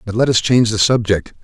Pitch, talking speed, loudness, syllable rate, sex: 110 Hz, 250 wpm, -15 LUFS, 6.4 syllables/s, male